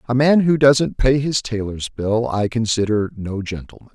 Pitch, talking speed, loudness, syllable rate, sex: 120 Hz, 185 wpm, -18 LUFS, 4.6 syllables/s, male